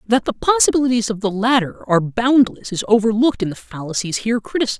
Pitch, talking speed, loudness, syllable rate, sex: 215 Hz, 190 wpm, -18 LUFS, 6.7 syllables/s, male